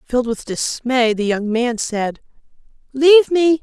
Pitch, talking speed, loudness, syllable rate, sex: 255 Hz, 150 wpm, -17 LUFS, 4.4 syllables/s, female